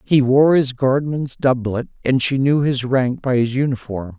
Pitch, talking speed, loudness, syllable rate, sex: 130 Hz, 185 wpm, -18 LUFS, 4.4 syllables/s, male